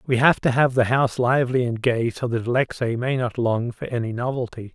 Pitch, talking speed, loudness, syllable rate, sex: 125 Hz, 230 wpm, -22 LUFS, 5.6 syllables/s, male